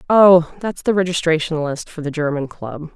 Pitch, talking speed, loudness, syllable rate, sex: 165 Hz, 185 wpm, -18 LUFS, 4.9 syllables/s, female